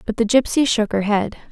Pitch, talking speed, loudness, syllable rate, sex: 225 Hz, 235 wpm, -18 LUFS, 5.7 syllables/s, female